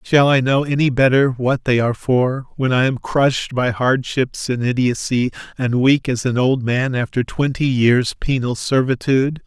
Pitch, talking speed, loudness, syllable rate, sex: 130 Hz, 175 wpm, -18 LUFS, 4.6 syllables/s, male